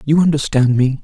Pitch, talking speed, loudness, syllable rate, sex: 140 Hz, 175 wpm, -15 LUFS, 5.5 syllables/s, male